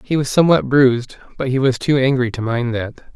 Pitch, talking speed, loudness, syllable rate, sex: 125 Hz, 230 wpm, -17 LUFS, 5.6 syllables/s, male